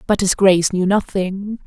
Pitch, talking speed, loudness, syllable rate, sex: 195 Hz, 180 wpm, -17 LUFS, 4.7 syllables/s, female